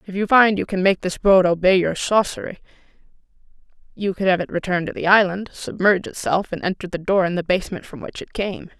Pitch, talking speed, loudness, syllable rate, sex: 190 Hz, 220 wpm, -19 LUFS, 6.0 syllables/s, female